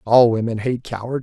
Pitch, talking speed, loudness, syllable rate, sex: 115 Hz, 195 wpm, -19 LUFS, 5.2 syllables/s, male